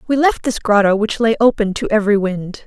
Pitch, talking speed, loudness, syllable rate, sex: 215 Hz, 225 wpm, -16 LUFS, 5.7 syllables/s, female